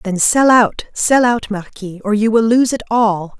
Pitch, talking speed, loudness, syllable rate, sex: 220 Hz, 195 wpm, -14 LUFS, 4.2 syllables/s, female